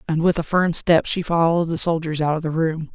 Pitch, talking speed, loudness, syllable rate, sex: 165 Hz, 265 wpm, -19 LUFS, 5.8 syllables/s, female